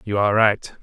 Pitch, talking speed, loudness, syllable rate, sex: 105 Hz, 220 wpm, -18 LUFS, 5.7 syllables/s, male